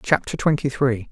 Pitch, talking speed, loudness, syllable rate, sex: 130 Hz, 160 wpm, -21 LUFS, 5.0 syllables/s, male